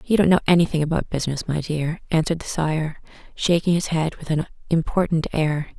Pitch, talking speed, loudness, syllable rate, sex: 160 Hz, 185 wpm, -22 LUFS, 5.8 syllables/s, female